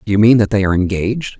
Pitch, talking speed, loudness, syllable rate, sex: 105 Hz, 300 wpm, -14 LUFS, 7.9 syllables/s, male